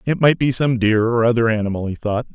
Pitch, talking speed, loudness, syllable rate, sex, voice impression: 115 Hz, 255 wpm, -18 LUFS, 6.0 syllables/s, male, masculine, adult-like, slightly middle-aged, thick, tensed, powerful, slightly bright, slightly hard, clear, fluent